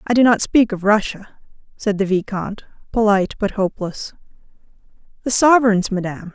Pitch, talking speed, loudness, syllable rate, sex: 210 Hz, 140 wpm, -18 LUFS, 5.8 syllables/s, female